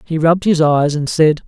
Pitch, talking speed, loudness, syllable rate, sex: 160 Hz, 245 wpm, -14 LUFS, 5.2 syllables/s, male